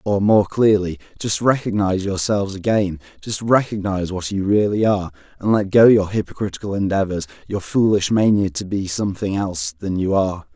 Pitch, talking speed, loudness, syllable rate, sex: 100 Hz, 165 wpm, -19 LUFS, 5.6 syllables/s, male